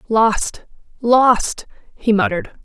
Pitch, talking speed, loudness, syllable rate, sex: 225 Hz, 90 wpm, -17 LUFS, 3.4 syllables/s, female